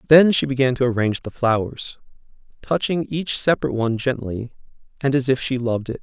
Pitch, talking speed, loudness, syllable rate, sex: 130 Hz, 180 wpm, -21 LUFS, 6.1 syllables/s, male